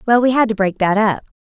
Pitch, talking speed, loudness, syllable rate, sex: 215 Hz, 285 wpm, -16 LUFS, 6.3 syllables/s, female